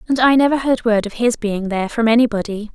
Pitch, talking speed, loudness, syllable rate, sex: 230 Hz, 240 wpm, -17 LUFS, 6.2 syllables/s, female